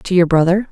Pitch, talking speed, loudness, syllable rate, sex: 180 Hz, 250 wpm, -14 LUFS, 6.0 syllables/s, female